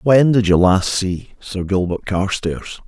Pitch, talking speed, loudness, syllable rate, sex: 100 Hz, 165 wpm, -17 LUFS, 3.6 syllables/s, male